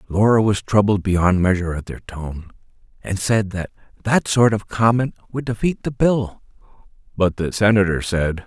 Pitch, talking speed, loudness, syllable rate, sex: 100 Hz, 165 wpm, -19 LUFS, 4.7 syllables/s, male